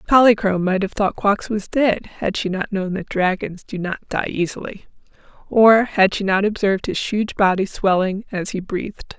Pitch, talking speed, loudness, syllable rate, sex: 200 Hz, 190 wpm, -19 LUFS, 4.9 syllables/s, female